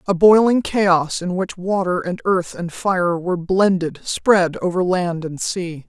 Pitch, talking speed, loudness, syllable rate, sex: 185 Hz, 175 wpm, -18 LUFS, 3.9 syllables/s, female